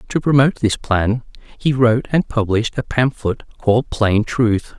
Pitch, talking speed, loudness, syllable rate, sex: 120 Hz, 165 wpm, -17 LUFS, 4.7 syllables/s, male